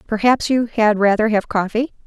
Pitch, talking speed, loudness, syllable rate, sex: 220 Hz, 175 wpm, -17 LUFS, 5.0 syllables/s, female